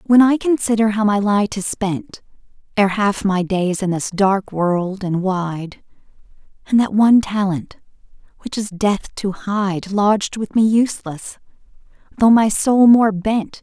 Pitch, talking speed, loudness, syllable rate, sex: 205 Hz, 160 wpm, -17 LUFS, 4.0 syllables/s, female